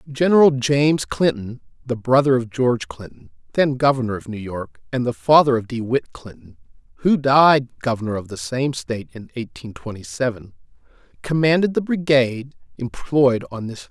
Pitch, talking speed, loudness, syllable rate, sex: 125 Hz, 165 wpm, -19 LUFS, 5.2 syllables/s, male